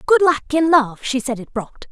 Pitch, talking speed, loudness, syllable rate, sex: 280 Hz, 250 wpm, -18 LUFS, 4.8 syllables/s, female